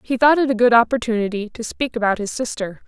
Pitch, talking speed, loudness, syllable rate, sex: 230 Hz, 230 wpm, -19 LUFS, 6.2 syllables/s, female